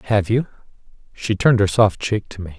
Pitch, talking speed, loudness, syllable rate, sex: 105 Hz, 210 wpm, -18 LUFS, 5.2 syllables/s, male